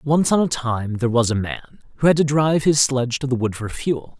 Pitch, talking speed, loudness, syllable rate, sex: 130 Hz, 270 wpm, -20 LUFS, 5.6 syllables/s, male